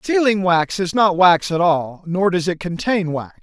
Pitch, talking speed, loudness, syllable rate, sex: 180 Hz, 210 wpm, -17 LUFS, 4.3 syllables/s, male